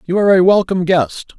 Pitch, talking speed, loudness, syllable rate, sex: 180 Hz, 215 wpm, -14 LUFS, 6.6 syllables/s, male